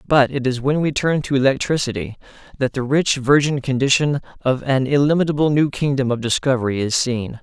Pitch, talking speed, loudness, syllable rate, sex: 135 Hz, 180 wpm, -19 LUFS, 5.5 syllables/s, male